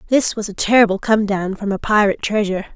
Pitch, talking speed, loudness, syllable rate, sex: 205 Hz, 220 wpm, -17 LUFS, 6.5 syllables/s, female